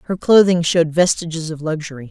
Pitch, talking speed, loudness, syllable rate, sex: 165 Hz, 170 wpm, -16 LUFS, 6.2 syllables/s, female